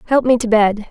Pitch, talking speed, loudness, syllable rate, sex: 225 Hz, 265 wpm, -14 LUFS, 6.0 syllables/s, female